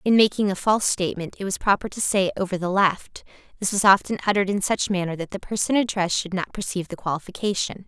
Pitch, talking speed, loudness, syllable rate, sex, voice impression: 195 Hz, 220 wpm, -23 LUFS, 6.6 syllables/s, female, feminine, middle-aged, clear, slightly fluent, intellectual, elegant, slightly strict